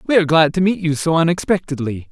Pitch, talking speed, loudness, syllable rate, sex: 160 Hz, 225 wpm, -17 LUFS, 6.6 syllables/s, male